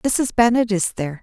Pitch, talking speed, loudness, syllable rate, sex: 215 Hz, 195 wpm, -18 LUFS, 5.4 syllables/s, female